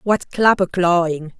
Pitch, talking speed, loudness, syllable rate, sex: 180 Hz, 130 wpm, -17 LUFS, 4.0 syllables/s, female